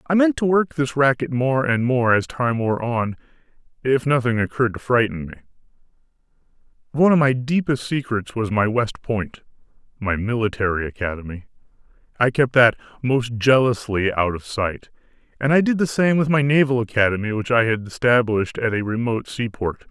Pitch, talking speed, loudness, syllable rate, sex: 120 Hz, 165 wpm, -20 LUFS, 5.3 syllables/s, male